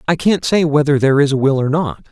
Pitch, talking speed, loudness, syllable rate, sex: 145 Hz, 285 wpm, -15 LUFS, 6.3 syllables/s, male